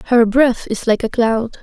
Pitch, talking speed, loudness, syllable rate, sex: 235 Hz, 220 wpm, -16 LUFS, 4.4 syllables/s, female